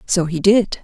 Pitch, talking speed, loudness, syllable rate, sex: 190 Hz, 215 wpm, -16 LUFS, 4.1 syllables/s, female